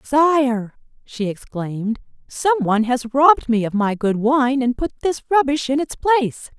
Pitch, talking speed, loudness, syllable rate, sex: 255 Hz, 175 wpm, -19 LUFS, 4.6 syllables/s, female